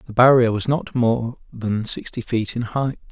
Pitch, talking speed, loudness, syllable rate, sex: 120 Hz, 190 wpm, -20 LUFS, 4.3 syllables/s, male